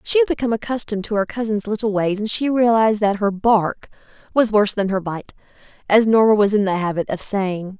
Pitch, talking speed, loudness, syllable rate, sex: 210 Hz, 215 wpm, -19 LUFS, 6.0 syllables/s, female